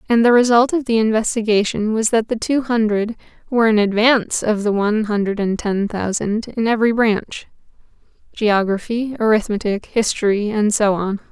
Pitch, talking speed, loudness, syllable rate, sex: 220 Hz, 155 wpm, -18 LUFS, 5.3 syllables/s, female